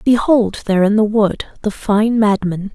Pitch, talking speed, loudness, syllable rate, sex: 210 Hz, 175 wpm, -15 LUFS, 4.5 syllables/s, female